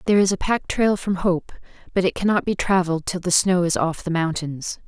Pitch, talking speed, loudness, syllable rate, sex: 180 Hz, 235 wpm, -21 LUFS, 5.5 syllables/s, female